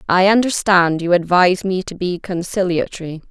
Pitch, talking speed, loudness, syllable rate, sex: 180 Hz, 125 wpm, -16 LUFS, 5.2 syllables/s, female